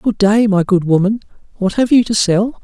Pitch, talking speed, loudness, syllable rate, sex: 205 Hz, 225 wpm, -14 LUFS, 5.0 syllables/s, male